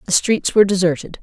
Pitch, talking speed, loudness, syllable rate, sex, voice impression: 190 Hz, 195 wpm, -16 LUFS, 6.4 syllables/s, female, feminine, very adult-like, intellectual, slightly calm, slightly strict